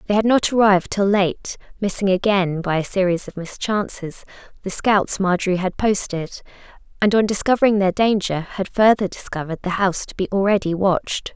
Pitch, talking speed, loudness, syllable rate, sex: 195 Hz, 170 wpm, -19 LUFS, 5.4 syllables/s, female